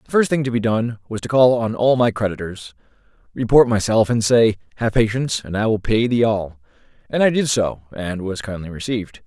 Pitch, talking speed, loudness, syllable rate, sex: 110 Hz, 215 wpm, -19 LUFS, 5.5 syllables/s, male